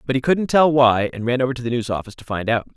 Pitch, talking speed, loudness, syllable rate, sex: 125 Hz, 325 wpm, -19 LUFS, 7.1 syllables/s, male